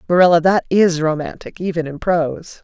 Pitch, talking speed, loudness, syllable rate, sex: 170 Hz, 160 wpm, -17 LUFS, 5.4 syllables/s, female